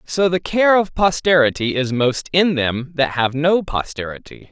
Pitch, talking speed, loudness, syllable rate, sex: 150 Hz, 175 wpm, -17 LUFS, 4.4 syllables/s, male